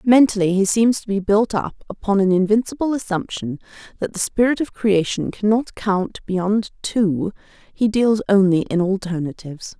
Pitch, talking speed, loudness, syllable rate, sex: 205 Hz, 155 wpm, -19 LUFS, 4.7 syllables/s, female